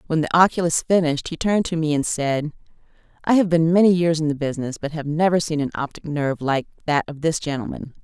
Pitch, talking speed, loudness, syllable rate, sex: 155 Hz, 225 wpm, -21 LUFS, 6.4 syllables/s, female